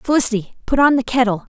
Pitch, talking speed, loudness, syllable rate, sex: 240 Hz, 195 wpm, -17 LUFS, 6.8 syllables/s, female